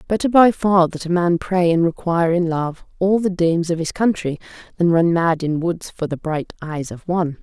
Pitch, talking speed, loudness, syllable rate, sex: 170 Hz, 225 wpm, -19 LUFS, 5.1 syllables/s, female